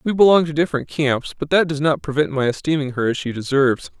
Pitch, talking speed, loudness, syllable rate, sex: 145 Hz, 240 wpm, -19 LUFS, 6.3 syllables/s, male